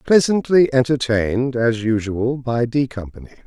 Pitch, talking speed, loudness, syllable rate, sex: 125 Hz, 120 wpm, -18 LUFS, 4.7 syllables/s, male